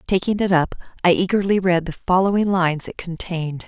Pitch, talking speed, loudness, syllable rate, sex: 180 Hz, 180 wpm, -20 LUFS, 5.8 syllables/s, female